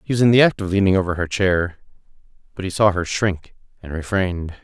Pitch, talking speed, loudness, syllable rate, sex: 95 Hz, 220 wpm, -19 LUFS, 6.1 syllables/s, male